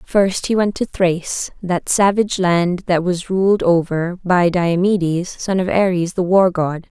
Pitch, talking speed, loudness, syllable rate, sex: 180 Hz, 170 wpm, -17 LUFS, 3.9 syllables/s, female